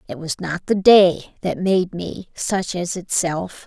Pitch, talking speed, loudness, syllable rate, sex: 175 Hz, 180 wpm, -19 LUFS, 3.9 syllables/s, female